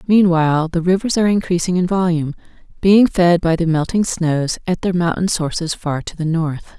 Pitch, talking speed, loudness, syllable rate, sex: 175 Hz, 185 wpm, -17 LUFS, 5.4 syllables/s, female